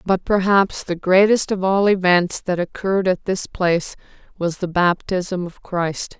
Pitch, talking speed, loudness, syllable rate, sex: 185 Hz, 165 wpm, -19 LUFS, 4.3 syllables/s, female